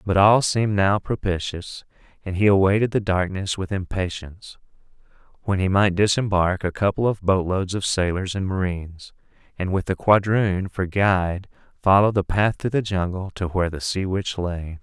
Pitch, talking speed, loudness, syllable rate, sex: 95 Hz, 175 wpm, -22 LUFS, 5.0 syllables/s, male